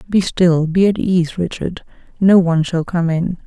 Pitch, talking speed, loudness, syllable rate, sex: 175 Hz, 190 wpm, -16 LUFS, 4.6 syllables/s, female